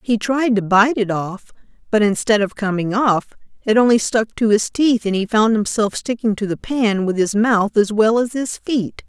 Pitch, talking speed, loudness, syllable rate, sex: 220 Hz, 220 wpm, -17 LUFS, 4.6 syllables/s, female